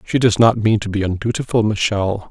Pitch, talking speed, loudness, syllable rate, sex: 110 Hz, 210 wpm, -17 LUFS, 5.6 syllables/s, male